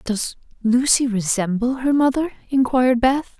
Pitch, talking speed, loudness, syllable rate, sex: 245 Hz, 125 wpm, -19 LUFS, 4.5 syllables/s, female